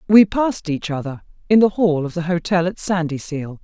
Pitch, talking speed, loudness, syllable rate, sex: 175 Hz, 200 wpm, -19 LUFS, 5.3 syllables/s, female